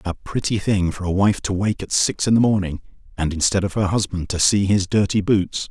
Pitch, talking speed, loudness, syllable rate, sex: 95 Hz, 240 wpm, -20 LUFS, 5.3 syllables/s, male